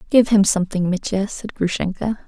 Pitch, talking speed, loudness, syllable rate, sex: 200 Hz, 160 wpm, -20 LUFS, 5.5 syllables/s, female